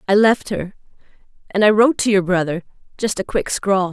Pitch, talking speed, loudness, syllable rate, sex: 200 Hz, 185 wpm, -18 LUFS, 5.5 syllables/s, female